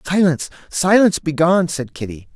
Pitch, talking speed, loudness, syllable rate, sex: 160 Hz, 125 wpm, -17 LUFS, 6.1 syllables/s, male